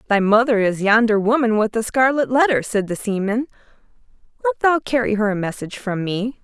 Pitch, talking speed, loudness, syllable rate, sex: 225 Hz, 185 wpm, -19 LUFS, 5.7 syllables/s, female